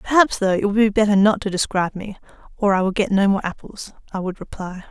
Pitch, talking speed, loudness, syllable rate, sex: 200 Hz, 245 wpm, -19 LUFS, 6.2 syllables/s, female